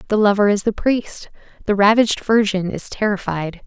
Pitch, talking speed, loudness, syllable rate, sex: 205 Hz, 165 wpm, -18 LUFS, 5.1 syllables/s, female